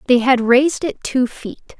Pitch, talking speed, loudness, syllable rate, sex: 255 Hz, 200 wpm, -16 LUFS, 4.5 syllables/s, female